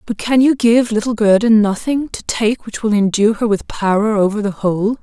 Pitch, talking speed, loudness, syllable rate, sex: 220 Hz, 215 wpm, -15 LUFS, 5.1 syllables/s, female